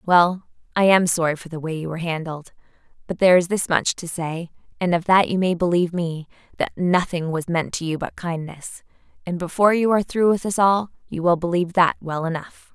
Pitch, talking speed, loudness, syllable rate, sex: 175 Hz, 215 wpm, -21 LUFS, 5.7 syllables/s, female